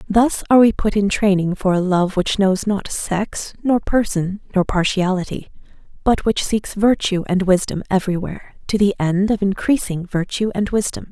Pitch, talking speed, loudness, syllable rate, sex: 195 Hz, 175 wpm, -18 LUFS, 4.9 syllables/s, female